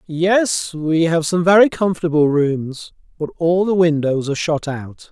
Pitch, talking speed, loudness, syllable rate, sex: 165 Hz, 165 wpm, -17 LUFS, 4.3 syllables/s, male